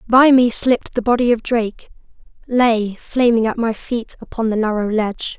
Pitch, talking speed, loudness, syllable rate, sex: 230 Hz, 180 wpm, -17 LUFS, 5.1 syllables/s, female